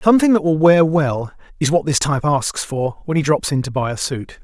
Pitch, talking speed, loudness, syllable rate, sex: 150 Hz, 255 wpm, -17 LUFS, 5.6 syllables/s, male